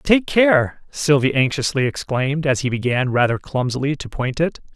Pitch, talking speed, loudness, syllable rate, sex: 140 Hz, 165 wpm, -19 LUFS, 4.9 syllables/s, male